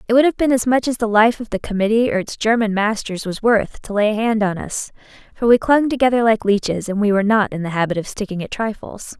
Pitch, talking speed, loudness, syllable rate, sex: 220 Hz, 265 wpm, -18 LUFS, 6.1 syllables/s, female